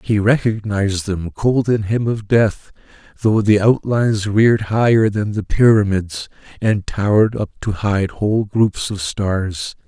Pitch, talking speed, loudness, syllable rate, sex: 105 Hz, 150 wpm, -17 LUFS, 4.2 syllables/s, male